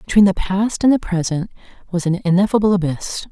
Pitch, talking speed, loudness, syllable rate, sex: 190 Hz, 180 wpm, -18 LUFS, 5.7 syllables/s, female